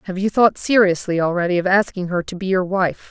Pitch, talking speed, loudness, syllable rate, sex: 185 Hz, 230 wpm, -18 LUFS, 5.8 syllables/s, female